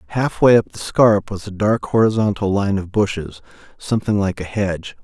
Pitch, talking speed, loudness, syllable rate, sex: 100 Hz, 180 wpm, -18 LUFS, 5.2 syllables/s, male